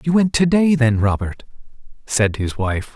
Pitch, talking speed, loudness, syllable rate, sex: 130 Hz, 185 wpm, -18 LUFS, 4.5 syllables/s, male